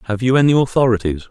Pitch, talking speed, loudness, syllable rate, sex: 120 Hz, 185 wpm, -15 LUFS, 7.4 syllables/s, male